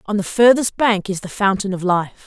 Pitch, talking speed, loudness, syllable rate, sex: 200 Hz, 240 wpm, -17 LUFS, 5.1 syllables/s, female